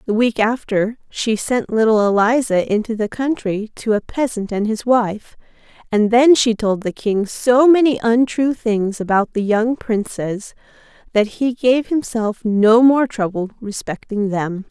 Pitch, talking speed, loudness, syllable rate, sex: 225 Hz, 160 wpm, -17 LUFS, 4.1 syllables/s, female